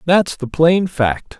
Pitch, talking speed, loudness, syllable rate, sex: 165 Hz, 170 wpm, -16 LUFS, 3.2 syllables/s, male